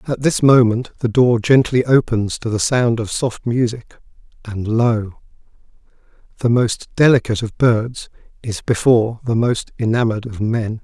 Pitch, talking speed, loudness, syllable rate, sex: 115 Hz, 150 wpm, -17 LUFS, 4.6 syllables/s, male